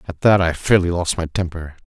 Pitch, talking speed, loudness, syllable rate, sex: 90 Hz, 225 wpm, -18 LUFS, 5.5 syllables/s, male